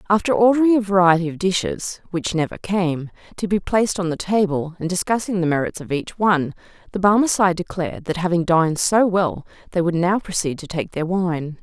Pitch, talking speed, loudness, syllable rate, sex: 180 Hz, 195 wpm, -20 LUFS, 5.6 syllables/s, female